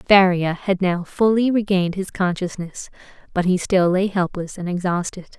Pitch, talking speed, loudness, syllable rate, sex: 185 Hz, 155 wpm, -20 LUFS, 4.9 syllables/s, female